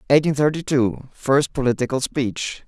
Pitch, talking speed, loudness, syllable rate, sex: 135 Hz, 110 wpm, -21 LUFS, 4.4 syllables/s, male